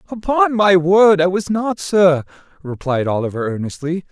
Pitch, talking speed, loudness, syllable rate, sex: 175 Hz, 145 wpm, -16 LUFS, 4.6 syllables/s, male